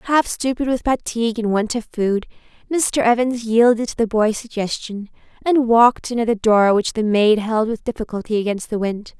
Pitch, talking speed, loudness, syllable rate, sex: 225 Hz, 195 wpm, -19 LUFS, 5.1 syllables/s, female